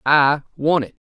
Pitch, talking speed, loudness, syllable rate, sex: 140 Hz, 170 wpm, -18 LUFS, 4.1 syllables/s, male